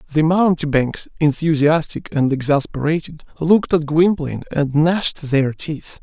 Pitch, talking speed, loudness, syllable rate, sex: 155 Hz, 120 wpm, -18 LUFS, 4.7 syllables/s, male